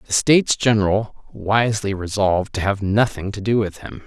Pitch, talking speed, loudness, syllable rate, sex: 105 Hz, 175 wpm, -19 LUFS, 5.2 syllables/s, male